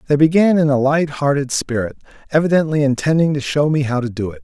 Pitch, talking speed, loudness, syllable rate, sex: 145 Hz, 205 wpm, -17 LUFS, 6.2 syllables/s, male